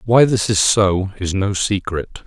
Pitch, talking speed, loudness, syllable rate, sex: 100 Hz, 185 wpm, -17 LUFS, 3.8 syllables/s, male